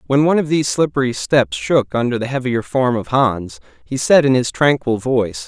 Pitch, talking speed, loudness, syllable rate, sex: 125 Hz, 210 wpm, -17 LUFS, 5.3 syllables/s, male